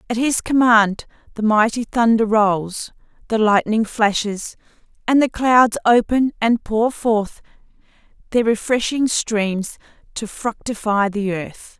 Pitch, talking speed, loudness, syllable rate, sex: 220 Hz, 120 wpm, -18 LUFS, 3.8 syllables/s, female